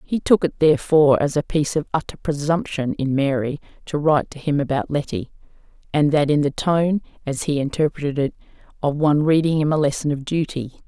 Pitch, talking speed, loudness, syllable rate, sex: 150 Hz, 195 wpm, -20 LUFS, 6.0 syllables/s, female